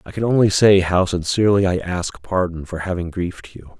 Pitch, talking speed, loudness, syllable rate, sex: 90 Hz, 205 wpm, -18 LUFS, 5.5 syllables/s, male